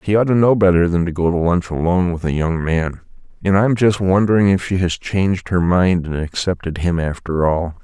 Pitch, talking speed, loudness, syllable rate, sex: 90 Hz, 235 wpm, -17 LUFS, 5.5 syllables/s, male